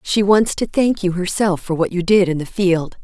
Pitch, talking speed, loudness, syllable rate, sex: 185 Hz, 255 wpm, -17 LUFS, 4.8 syllables/s, female